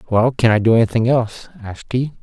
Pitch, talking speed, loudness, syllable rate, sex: 115 Hz, 215 wpm, -16 LUFS, 6.7 syllables/s, male